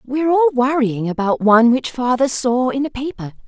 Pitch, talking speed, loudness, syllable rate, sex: 255 Hz, 190 wpm, -17 LUFS, 5.5 syllables/s, female